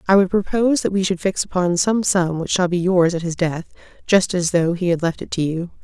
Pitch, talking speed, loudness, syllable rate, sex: 180 Hz, 255 wpm, -19 LUFS, 5.5 syllables/s, female